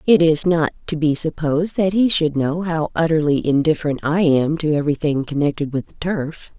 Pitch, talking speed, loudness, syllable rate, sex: 155 Hz, 190 wpm, -19 LUFS, 5.3 syllables/s, female